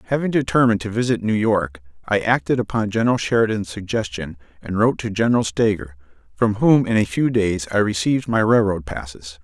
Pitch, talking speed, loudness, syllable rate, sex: 105 Hz, 180 wpm, -20 LUFS, 5.9 syllables/s, male